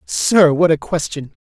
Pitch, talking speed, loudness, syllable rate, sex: 160 Hz, 170 wpm, -15 LUFS, 4.0 syllables/s, male